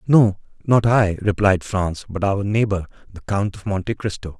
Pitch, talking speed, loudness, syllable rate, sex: 100 Hz, 180 wpm, -20 LUFS, 4.7 syllables/s, male